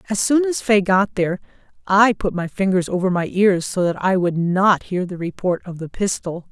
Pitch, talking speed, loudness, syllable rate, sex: 190 Hz, 220 wpm, -19 LUFS, 5.0 syllables/s, female